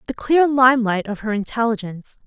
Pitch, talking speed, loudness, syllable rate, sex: 230 Hz, 160 wpm, -18 LUFS, 6.0 syllables/s, female